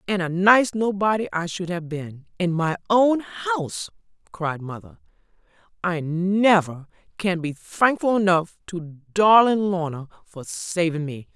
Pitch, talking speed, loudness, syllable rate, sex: 180 Hz, 135 wpm, -22 LUFS, 4.0 syllables/s, female